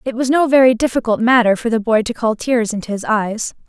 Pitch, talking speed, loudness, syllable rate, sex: 235 Hz, 245 wpm, -16 LUFS, 5.8 syllables/s, female